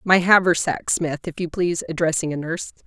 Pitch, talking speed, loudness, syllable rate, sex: 170 Hz, 190 wpm, -21 LUFS, 5.9 syllables/s, female